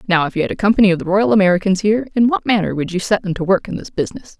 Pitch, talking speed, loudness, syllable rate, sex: 195 Hz, 315 wpm, -16 LUFS, 7.7 syllables/s, female